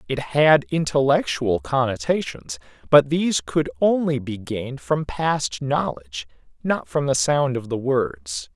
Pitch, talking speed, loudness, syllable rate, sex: 130 Hz, 140 wpm, -21 LUFS, 4.1 syllables/s, male